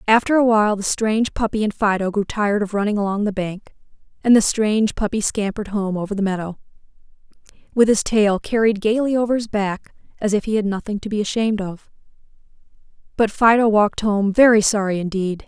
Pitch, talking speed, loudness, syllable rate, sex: 210 Hz, 185 wpm, -19 LUFS, 6.0 syllables/s, female